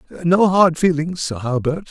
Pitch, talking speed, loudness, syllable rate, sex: 165 Hz, 155 wpm, -17 LUFS, 4.8 syllables/s, male